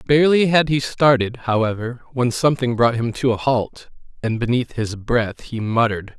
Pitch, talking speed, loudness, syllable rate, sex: 120 Hz, 175 wpm, -19 LUFS, 5.1 syllables/s, male